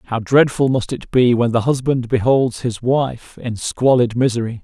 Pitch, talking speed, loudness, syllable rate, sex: 125 Hz, 180 wpm, -17 LUFS, 4.4 syllables/s, male